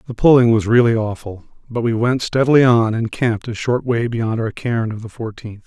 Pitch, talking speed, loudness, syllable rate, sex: 115 Hz, 220 wpm, -17 LUFS, 5.3 syllables/s, male